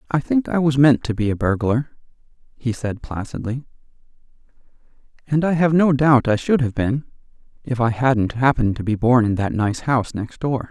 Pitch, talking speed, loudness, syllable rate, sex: 125 Hz, 190 wpm, -19 LUFS, 5.2 syllables/s, male